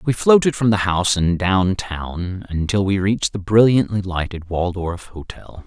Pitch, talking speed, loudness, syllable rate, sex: 95 Hz, 170 wpm, -19 LUFS, 4.5 syllables/s, male